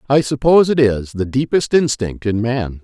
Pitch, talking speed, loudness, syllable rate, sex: 125 Hz, 190 wpm, -16 LUFS, 5.0 syllables/s, male